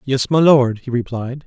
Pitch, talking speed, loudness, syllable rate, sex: 130 Hz, 205 wpm, -16 LUFS, 4.4 syllables/s, male